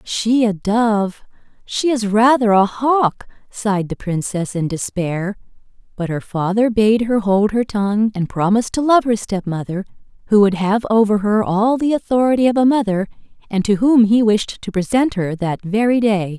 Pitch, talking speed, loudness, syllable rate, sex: 215 Hz, 175 wpm, -17 LUFS, 4.7 syllables/s, female